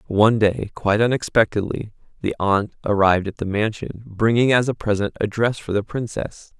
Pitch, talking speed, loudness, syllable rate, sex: 105 Hz, 175 wpm, -20 LUFS, 5.3 syllables/s, male